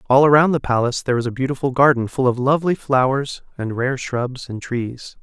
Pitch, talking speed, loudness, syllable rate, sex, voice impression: 130 Hz, 205 wpm, -19 LUFS, 5.8 syllables/s, male, masculine, adult-like, slightly middle-aged, slightly thick, slightly tensed, slightly powerful, bright, slightly hard, clear, fluent, cool, very intellectual, refreshing, very sincere, calm, slightly mature, very friendly, reassuring, unique, very elegant, slightly sweet, lively, kind, slightly modest, slightly light